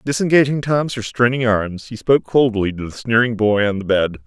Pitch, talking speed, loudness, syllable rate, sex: 115 Hz, 195 wpm, -17 LUFS, 5.4 syllables/s, male